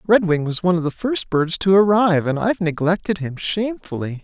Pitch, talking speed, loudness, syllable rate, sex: 175 Hz, 200 wpm, -19 LUFS, 5.8 syllables/s, male